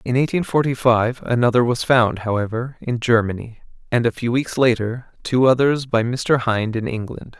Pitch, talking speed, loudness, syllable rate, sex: 120 Hz, 180 wpm, -19 LUFS, 4.9 syllables/s, male